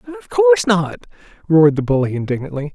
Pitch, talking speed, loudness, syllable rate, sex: 145 Hz, 155 wpm, -16 LUFS, 7.0 syllables/s, male